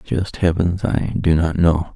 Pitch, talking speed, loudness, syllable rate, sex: 85 Hz, 185 wpm, -18 LUFS, 3.9 syllables/s, male